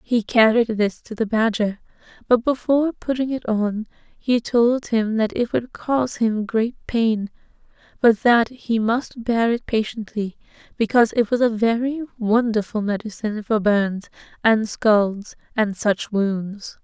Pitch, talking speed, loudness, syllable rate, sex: 225 Hz, 150 wpm, -21 LUFS, 4.1 syllables/s, female